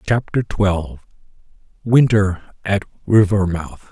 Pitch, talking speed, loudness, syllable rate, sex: 100 Hz, 60 wpm, -18 LUFS, 3.9 syllables/s, male